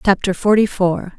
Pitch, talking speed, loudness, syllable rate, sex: 195 Hz, 150 wpm, -16 LUFS, 4.8 syllables/s, female